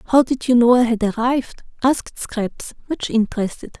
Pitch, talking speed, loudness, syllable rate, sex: 240 Hz, 175 wpm, -19 LUFS, 5.2 syllables/s, female